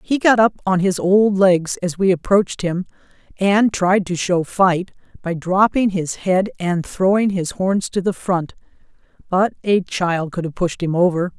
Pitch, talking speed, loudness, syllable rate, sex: 185 Hz, 185 wpm, -18 LUFS, 4.3 syllables/s, female